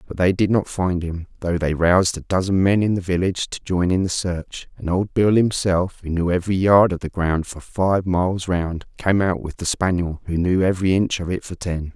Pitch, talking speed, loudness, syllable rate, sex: 90 Hz, 240 wpm, -20 LUFS, 5.3 syllables/s, male